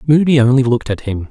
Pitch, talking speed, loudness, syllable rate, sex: 130 Hz, 230 wpm, -14 LUFS, 6.8 syllables/s, male